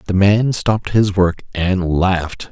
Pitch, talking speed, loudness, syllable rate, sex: 95 Hz, 165 wpm, -16 LUFS, 4.0 syllables/s, male